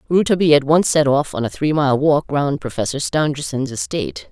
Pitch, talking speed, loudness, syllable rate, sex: 145 Hz, 195 wpm, -18 LUFS, 5.8 syllables/s, female